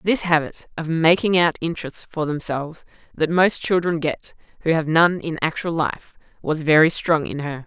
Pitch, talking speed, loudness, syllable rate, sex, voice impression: 160 Hz, 180 wpm, -20 LUFS, 4.8 syllables/s, female, very feminine, slightly young, very adult-like, thin, slightly tensed, slightly powerful, slightly dark, slightly hard, clear, fluent, slightly cute, cool, intellectual, very refreshing, sincere, calm, friendly, reassuring, unique, elegant, wild, slightly sweet, lively, slightly strict, slightly intense, slightly light